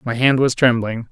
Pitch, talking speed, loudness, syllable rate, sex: 125 Hz, 215 wpm, -16 LUFS, 5.0 syllables/s, male